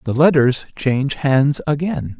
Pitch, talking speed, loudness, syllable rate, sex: 140 Hz, 135 wpm, -17 LUFS, 4.1 syllables/s, male